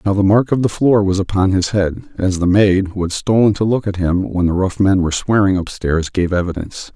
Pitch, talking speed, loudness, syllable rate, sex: 95 Hz, 250 wpm, -16 LUFS, 3.3 syllables/s, male